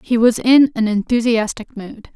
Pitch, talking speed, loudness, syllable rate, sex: 230 Hz, 165 wpm, -15 LUFS, 4.5 syllables/s, female